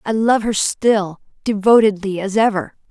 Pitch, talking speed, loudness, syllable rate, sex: 210 Hz, 145 wpm, -17 LUFS, 4.5 syllables/s, female